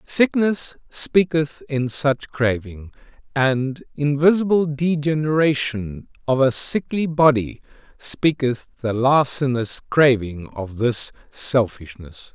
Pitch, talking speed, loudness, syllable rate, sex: 135 Hz, 90 wpm, -20 LUFS, 3.5 syllables/s, male